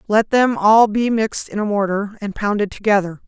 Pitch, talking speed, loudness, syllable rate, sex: 210 Hz, 200 wpm, -17 LUFS, 5.4 syllables/s, female